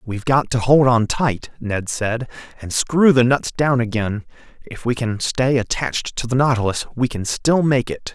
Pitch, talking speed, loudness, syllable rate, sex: 120 Hz, 200 wpm, -19 LUFS, 4.6 syllables/s, male